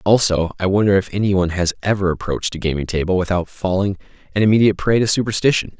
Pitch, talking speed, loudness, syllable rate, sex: 95 Hz, 195 wpm, -18 LUFS, 6.9 syllables/s, male